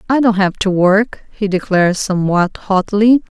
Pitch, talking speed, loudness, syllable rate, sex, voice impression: 200 Hz, 160 wpm, -14 LUFS, 4.6 syllables/s, female, feminine, very adult-like, slightly clear, sincere, slightly elegant